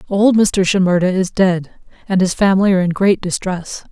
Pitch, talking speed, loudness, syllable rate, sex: 190 Hz, 185 wpm, -15 LUFS, 5.3 syllables/s, female